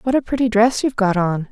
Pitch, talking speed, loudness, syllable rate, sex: 220 Hz, 280 wpm, -18 LUFS, 6.4 syllables/s, female